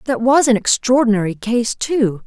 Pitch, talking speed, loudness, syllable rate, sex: 235 Hz, 160 wpm, -16 LUFS, 4.8 syllables/s, female